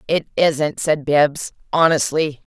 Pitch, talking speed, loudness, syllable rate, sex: 150 Hz, 120 wpm, -18 LUFS, 3.6 syllables/s, female